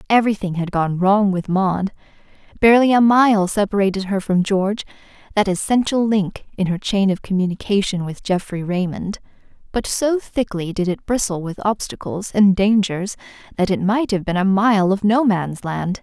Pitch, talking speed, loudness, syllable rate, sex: 200 Hz, 170 wpm, -19 LUFS, 4.9 syllables/s, female